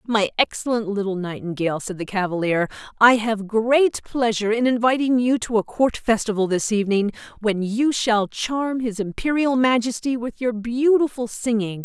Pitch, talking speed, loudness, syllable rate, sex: 225 Hz, 155 wpm, -21 LUFS, 4.9 syllables/s, female